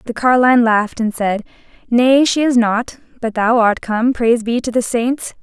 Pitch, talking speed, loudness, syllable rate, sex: 235 Hz, 200 wpm, -15 LUFS, 4.8 syllables/s, female